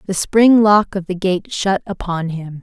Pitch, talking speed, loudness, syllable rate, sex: 190 Hz, 205 wpm, -16 LUFS, 4.1 syllables/s, female